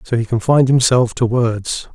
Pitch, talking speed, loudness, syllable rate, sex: 120 Hz, 185 wpm, -15 LUFS, 5.0 syllables/s, male